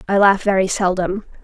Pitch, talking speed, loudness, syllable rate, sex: 195 Hz, 170 wpm, -17 LUFS, 5.3 syllables/s, female